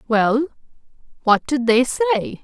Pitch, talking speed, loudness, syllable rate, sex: 245 Hz, 125 wpm, -19 LUFS, 4.8 syllables/s, female